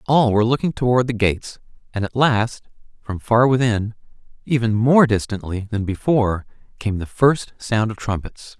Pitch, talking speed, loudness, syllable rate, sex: 115 Hz, 160 wpm, -19 LUFS, 4.9 syllables/s, male